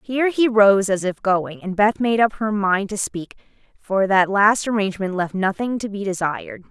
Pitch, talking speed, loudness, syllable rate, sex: 205 Hz, 205 wpm, -19 LUFS, 4.9 syllables/s, female